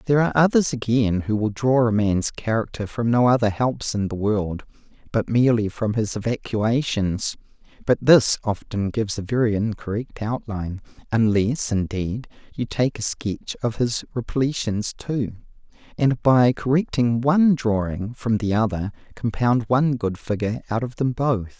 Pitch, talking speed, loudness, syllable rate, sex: 115 Hz, 150 wpm, -22 LUFS, 4.8 syllables/s, male